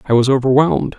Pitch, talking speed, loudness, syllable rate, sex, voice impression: 125 Hz, 185 wpm, -14 LUFS, 6.7 syllables/s, male, masculine, adult-like, tensed, slightly powerful, bright, clear, cool, intellectual, refreshing, calm, friendly, wild, lively, kind